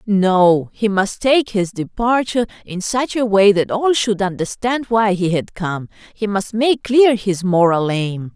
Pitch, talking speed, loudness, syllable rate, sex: 205 Hz, 180 wpm, -17 LUFS, 4.0 syllables/s, female